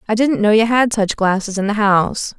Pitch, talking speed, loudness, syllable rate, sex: 215 Hz, 250 wpm, -16 LUFS, 5.5 syllables/s, female